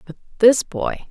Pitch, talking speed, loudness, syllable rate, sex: 225 Hz, 165 wpm, -18 LUFS, 4.2 syllables/s, female